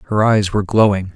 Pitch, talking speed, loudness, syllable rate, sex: 100 Hz, 210 wpm, -15 LUFS, 6.5 syllables/s, male